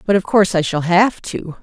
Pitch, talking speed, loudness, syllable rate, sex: 185 Hz, 260 wpm, -15 LUFS, 5.4 syllables/s, female